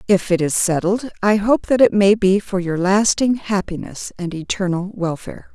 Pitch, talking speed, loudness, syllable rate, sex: 195 Hz, 185 wpm, -18 LUFS, 4.8 syllables/s, female